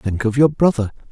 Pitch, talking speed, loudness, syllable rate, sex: 125 Hz, 215 wpm, -17 LUFS, 5.4 syllables/s, male